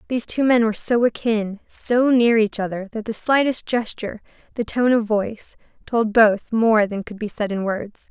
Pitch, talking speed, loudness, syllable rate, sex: 220 Hz, 200 wpm, -20 LUFS, 4.9 syllables/s, female